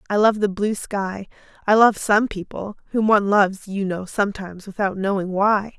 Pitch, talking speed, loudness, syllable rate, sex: 200 Hz, 185 wpm, -20 LUFS, 5.2 syllables/s, female